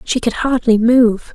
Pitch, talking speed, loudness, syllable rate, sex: 235 Hz, 180 wpm, -14 LUFS, 4.0 syllables/s, female